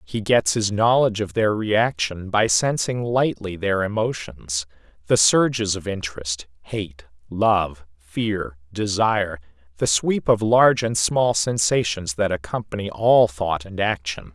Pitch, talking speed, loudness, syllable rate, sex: 100 Hz, 140 wpm, -21 LUFS, 4.1 syllables/s, male